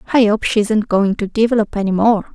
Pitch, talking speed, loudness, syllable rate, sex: 215 Hz, 230 wpm, -16 LUFS, 5.9 syllables/s, female